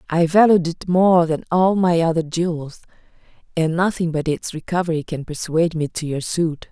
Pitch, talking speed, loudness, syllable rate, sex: 165 Hz, 180 wpm, -19 LUFS, 5.1 syllables/s, female